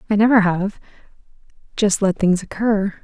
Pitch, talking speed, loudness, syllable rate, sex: 200 Hz, 120 wpm, -18 LUFS, 4.8 syllables/s, female